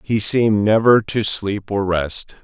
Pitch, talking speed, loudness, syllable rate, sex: 105 Hz, 175 wpm, -17 LUFS, 3.9 syllables/s, male